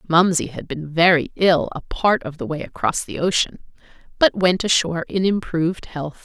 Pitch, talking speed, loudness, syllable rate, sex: 170 Hz, 185 wpm, -20 LUFS, 5.0 syllables/s, female